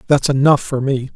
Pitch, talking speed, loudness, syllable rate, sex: 135 Hz, 210 wpm, -16 LUFS, 5.3 syllables/s, male